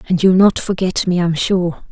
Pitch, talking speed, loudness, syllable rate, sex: 180 Hz, 220 wpm, -15 LUFS, 4.7 syllables/s, female